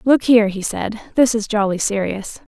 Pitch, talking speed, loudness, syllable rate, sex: 215 Hz, 190 wpm, -18 LUFS, 5.1 syllables/s, female